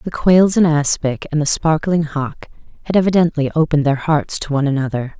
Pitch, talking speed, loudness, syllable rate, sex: 155 Hz, 185 wpm, -16 LUFS, 5.6 syllables/s, female